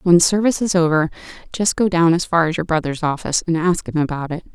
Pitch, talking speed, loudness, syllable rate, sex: 165 Hz, 235 wpm, -18 LUFS, 6.4 syllables/s, female